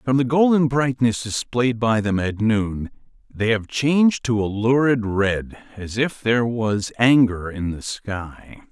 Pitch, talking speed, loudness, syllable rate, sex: 115 Hz, 160 wpm, -20 LUFS, 3.9 syllables/s, male